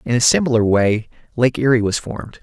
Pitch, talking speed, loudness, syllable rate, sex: 120 Hz, 200 wpm, -17 LUFS, 5.8 syllables/s, male